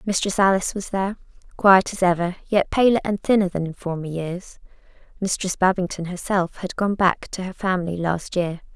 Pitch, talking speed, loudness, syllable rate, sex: 185 Hz, 180 wpm, -22 LUFS, 3.5 syllables/s, female